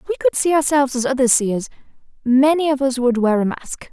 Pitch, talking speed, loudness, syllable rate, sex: 270 Hz, 245 wpm, -17 LUFS, 7.6 syllables/s, female